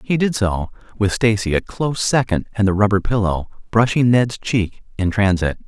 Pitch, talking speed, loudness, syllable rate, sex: 105 Hz, 180 wpm, -19 LUFS, 5.0 syllables/s, male